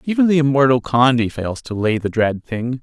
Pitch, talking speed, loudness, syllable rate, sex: 125 Hz, 210 wpm, -17 LUFS, 5.1 syllables/s, male